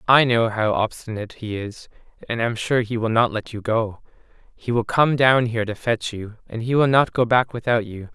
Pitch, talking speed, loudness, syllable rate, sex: 115 Hz, 230 wpm, -21 LUFS, 5.2 syllables/s, male